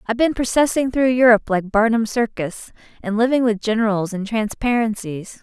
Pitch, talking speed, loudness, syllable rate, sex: 225 Hz, 155 wpm, -19 LUFS, 5.4 syllables/s, female